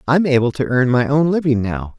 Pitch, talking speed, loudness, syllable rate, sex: 135 Hz, 240 wpm, -17 LUFS, 5.4 syllables/s, male